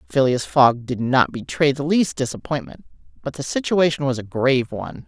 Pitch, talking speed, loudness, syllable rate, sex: 140 Hz, 175 wpm, -20 LUFS, 5.3 syllables/s, female